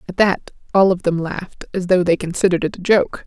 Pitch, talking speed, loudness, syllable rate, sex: 180 Hz, 240 wpm, -18 LUFS, 6.1 syllables/s, female